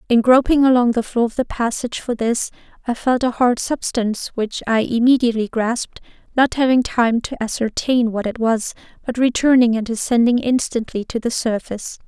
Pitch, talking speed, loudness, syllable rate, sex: 235 Hz, 175 wpm, -18 LUFS, 5.3 syllables/s, female